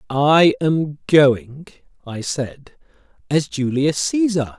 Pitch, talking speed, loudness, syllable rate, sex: 150 Hz, 105 wpm, -18 LUFS, 2.6 syllables/s, male